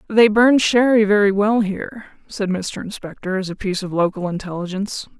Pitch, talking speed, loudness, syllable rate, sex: 200 Hz, 175 wpm, -18 LUFS, 5.4 syllables/s, female